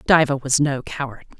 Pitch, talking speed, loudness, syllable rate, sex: 140 Hz, 170 wpm, -20 LUFS, 4.8 syllables/s, female